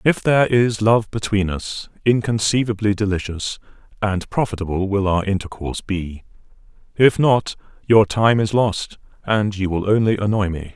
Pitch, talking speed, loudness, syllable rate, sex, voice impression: 105 Hz, 145 wpm, -19 LUFS, 4.8 syllables/s, male, masculine, middle-aged, tensed, slightly dark, hard, clear, fluent, intellectual, calm, wild, slightly kind, slightly modest